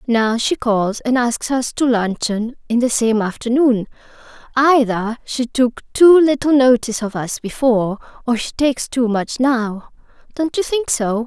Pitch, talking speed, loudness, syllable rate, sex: 245 Hz, 160 wpm, -17 LUFS, 4.4 syllables/s, female